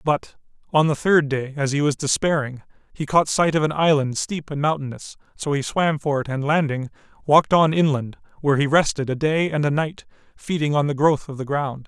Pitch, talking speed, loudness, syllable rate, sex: 145 Hz, 215 wpm, -21 LUFS, 5.4 syllables/s, male